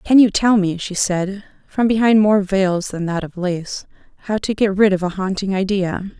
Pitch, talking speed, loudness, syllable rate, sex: 195 Hz, 215 wpm, -18 LUFS, 4.7 syllables/s, female